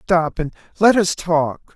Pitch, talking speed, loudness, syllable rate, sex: 175 Hz, 170 wpm, -18 LUFS, 3.4 syllables/s, male